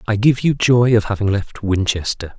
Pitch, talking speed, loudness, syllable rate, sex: 110 Hz, 200 wpm, -17 LUFS, 4.9 syllables/s, male